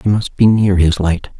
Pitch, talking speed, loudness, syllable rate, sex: 95 Hz, 255 wpm, -14 LUFS, 4.6 syllables/s, male